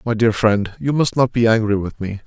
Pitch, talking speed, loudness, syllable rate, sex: 110 Hz, 265 wpm, -18 LUFS, 5.3 syllables/s, male